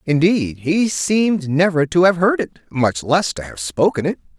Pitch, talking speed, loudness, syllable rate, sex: 160 Hz, 180 wpm, -18 LUFS, 4.6 syllables/s, male